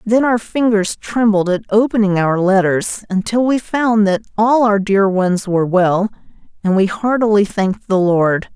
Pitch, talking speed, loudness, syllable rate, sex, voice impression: 205 Hz, 170 wpm, -15 LUFS, 4.5 syllables/s, female, feminine, adult-like, tensed, powerful, bright, clear, intellectual, friendly, slightly reassuring, elegant, lively, slightly kind